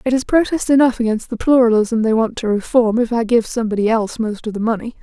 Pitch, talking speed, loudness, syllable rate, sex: 230 Hz, 240 wpm, -17 LUFS, 6.4 syllables/s, female